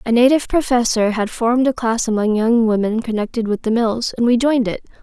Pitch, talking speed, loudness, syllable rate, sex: 230 Hz, 215 wpm, -17 LUFS, 5.9 syllables/s, female